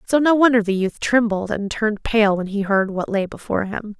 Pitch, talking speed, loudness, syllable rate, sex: 210 Hz, 240 wpm, -19 LUFS, 5.5 syllables/s, female